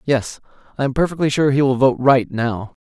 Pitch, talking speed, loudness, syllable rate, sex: 130 Hz, 210 wpm, -18 LUFS, 5.3 syllables/s, male